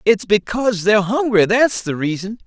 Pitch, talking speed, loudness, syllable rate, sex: 210 Hz, 170 wpm, -17 LUFS, 5.2 syllables/s, male